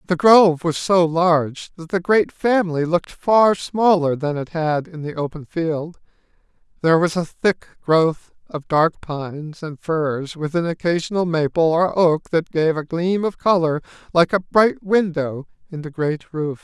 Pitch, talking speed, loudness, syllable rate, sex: 165 Hz, 175 wpm, -19 LUFS, 4.4 syllables/s, male